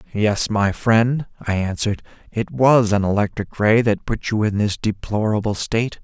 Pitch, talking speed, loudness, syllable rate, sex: 105 Hz, 170 wpm, -19 LUFS, 4.7 syllables/s, male